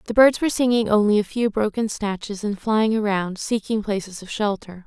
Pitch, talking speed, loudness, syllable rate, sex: 210 Hz, 195 wpm, -21 LUFS, 5.3 syllables/s, female